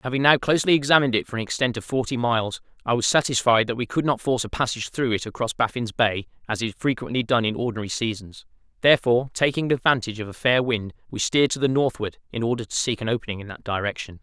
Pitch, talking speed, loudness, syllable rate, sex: 120 Hz, 230 wpm, -23 LUFS, 6.9 syllables/s, male